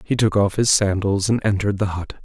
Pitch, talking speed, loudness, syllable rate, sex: 100 Hz, 240 wpm, -19 LUFS, 5.9 syllables/s, male